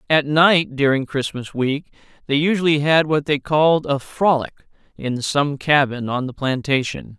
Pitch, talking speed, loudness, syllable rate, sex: 145 Hz, 160 wpm, -19 LUFS, 4.5 syllables/s, male